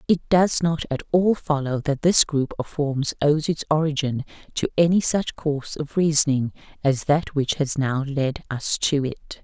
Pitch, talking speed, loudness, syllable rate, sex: 150 Hz, 185 wpm, -22 LUFS, 4.5 syllables/s, female